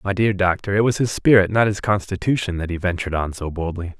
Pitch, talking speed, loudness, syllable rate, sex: 95 Hz, 240 wpm, -20 LUFS, 6.2 syllables/s, male